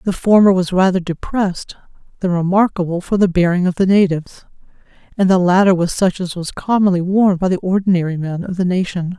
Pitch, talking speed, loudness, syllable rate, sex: 185 Hz, 190 wpm, -16 LUFS, 5.8 syllables/s, female